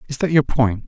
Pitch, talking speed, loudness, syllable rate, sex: 130 Hz, 275 wpm, -18 LUFS, 5.8 syllables/s, male